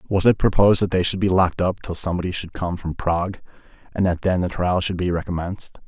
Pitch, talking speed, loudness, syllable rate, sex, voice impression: 90 Hz, 235 wpm, -21 LUFS, 6.3 syllables/s, male, masculine, adult-like, relaxed, slightly dark, muffled, slightly raspy, intellectual, calm, wild, slightly strict, slightly modest